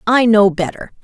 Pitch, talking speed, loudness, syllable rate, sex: 205 Hz, 175 wpm, -14 LUFS, 4.9 syllables/s, female